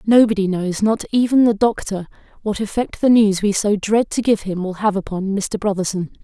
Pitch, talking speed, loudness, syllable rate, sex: 205 Hz, 200 wpm, -18 LUFS, 5.2 syllables/s, female